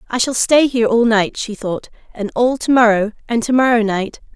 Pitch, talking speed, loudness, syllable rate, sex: 230 Hz, 220 wpm, -16 LUFS, 5.2 syllables/s, female